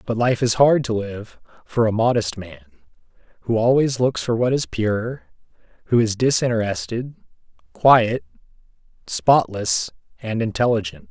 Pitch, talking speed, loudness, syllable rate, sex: 115 Hz, 130 wpm, -20 LUFS, 4.4 syllables/s, male